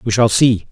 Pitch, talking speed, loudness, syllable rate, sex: 105 Hz, 250 wpm, -14 LUFS, 5.2 syllables/s, male